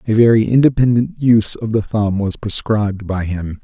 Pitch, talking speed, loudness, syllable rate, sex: 110 Hz, 180 wpm, -16 LUFS, 5.2 syllables/s, male